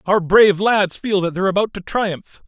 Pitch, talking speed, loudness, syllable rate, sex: 190 Hz, 220 wpm, -17 LUFS, 5.3 syllables/s, male